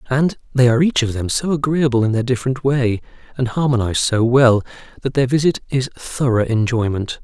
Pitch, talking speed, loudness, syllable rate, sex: 125 Hz, 180 wpm, -18 LUFS, 5.6 syllables/s, male